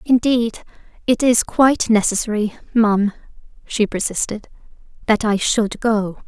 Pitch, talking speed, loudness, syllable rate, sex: 220 Hz, 115 wpm, -18 LUFS, 4.5 syllables/s, female